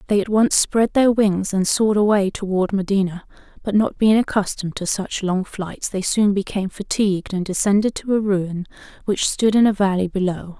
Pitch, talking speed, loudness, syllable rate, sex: 200 Hz, 195 wpm, -19 LUFS, 5.2 syllables/s, female